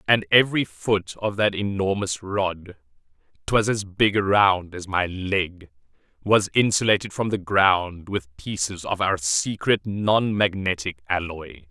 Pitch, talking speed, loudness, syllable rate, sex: 95 Hz, 135 wpm, -22 LUFS, 4.0 syllables/s, male